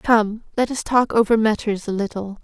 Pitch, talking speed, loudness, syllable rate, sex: 220 Hz, 195 wpm, -20 LUFS, 4.9 syllables/s, female